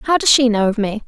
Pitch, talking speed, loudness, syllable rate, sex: 235 Hz, 280 wpm, -15 LUFS, 5.1 syllables/s, female